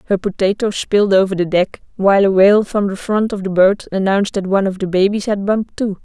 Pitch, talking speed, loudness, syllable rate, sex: 195 Hz, 240 wpm, -16 LUFS, 6.0 syllables/s, female